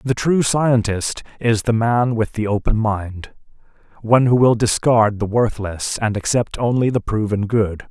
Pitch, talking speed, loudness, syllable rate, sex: 110 Hz, 165 wpm, -18 LUFS, 4.3 syllables/s, male